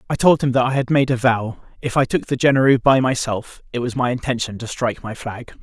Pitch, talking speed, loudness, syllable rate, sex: 125 Hz, 255 wpm, -19 LUFS, 5.9 syllables/s, male